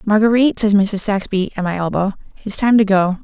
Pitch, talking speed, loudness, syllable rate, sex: 205 Hz, 220 wpm, -16 LUFS, 6.0 syllables/s, female